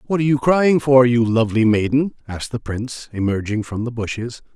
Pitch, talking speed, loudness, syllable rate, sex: 120 Hz, 195 wpm, -18 LUFS, 5.7 syllables/s, male